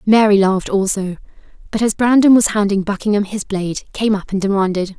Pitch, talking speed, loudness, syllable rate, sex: 205 Hz, 180 wpm, -16 LUFS, 5.9 syllables/s, female